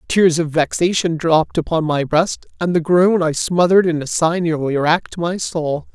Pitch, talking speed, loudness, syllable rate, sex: 165 Hz, 190 wpm, -17 LUFS, 4.8 syllables/s, male